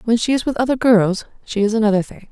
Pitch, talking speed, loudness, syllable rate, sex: 220 Hz, 260 wpm, -17 LUFS, 6.5 syllables/s, female